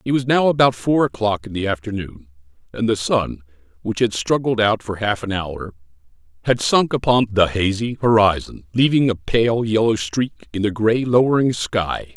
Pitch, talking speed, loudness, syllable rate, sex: 110 Hz, 180 wpm, -19 LUFS, 4.8 syllables/s, male